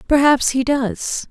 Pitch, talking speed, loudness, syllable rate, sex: 270 Hz, 140 wpm, -17 LUFS, 3.7 syllables/s, female